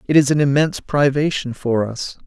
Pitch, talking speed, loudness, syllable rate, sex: 140 Hz, 185 wpm, -18 LUFS, 5.4 syllables/s, male